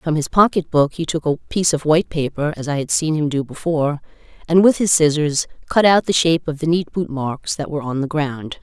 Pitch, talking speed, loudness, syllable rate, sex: 155 Hz, 245 wpm, -18 LUFS, 5.7 syllables/s, female